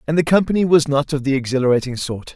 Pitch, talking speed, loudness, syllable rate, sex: 145 Hz, 230 wpm, -18 LUFS, 6.8 syllables/s, male